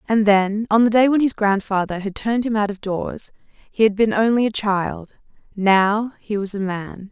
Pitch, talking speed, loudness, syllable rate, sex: 210 Hz, 210 wpm, -19 LUFS, 4.6 syllables/s, female